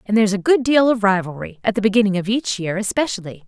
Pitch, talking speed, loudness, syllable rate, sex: 210 Hz, 225 wpm, -18 LUFS, 6.6 syllables/s, female